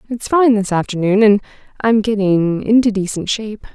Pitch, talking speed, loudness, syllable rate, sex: 210 Hz, 160 wpm, -15 LUFS, 5.1 syllables/s, female